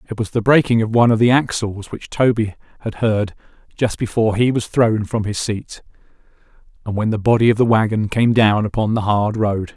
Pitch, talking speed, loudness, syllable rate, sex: 110 Hz, 210 wpm, -17 LUFS, 5.5 syllables/s, male